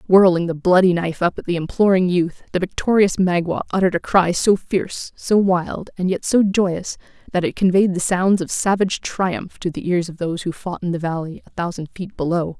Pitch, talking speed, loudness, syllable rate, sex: 180 Hz, 215 wpm, -19 LUFS, 5.4 syllables/s, female